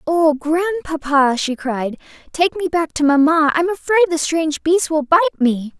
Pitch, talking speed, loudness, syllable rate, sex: 320 Hz, 175 wpm, -17 LUFS, 4.4 syllables/s, female